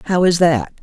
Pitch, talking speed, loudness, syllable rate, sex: 170 Hz, 220 wpm, -15 LUFS, 5.2 syllables/s, female